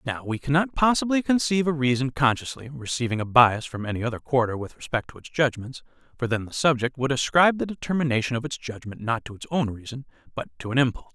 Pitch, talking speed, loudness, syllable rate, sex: 135 Hz, 215 wpm, -24 LUFS, 6.6 syllables/s, male